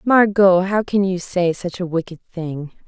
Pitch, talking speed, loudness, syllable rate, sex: 185 Hz, 190 wpm, -18 LUFS, 4.2 syllables/s, female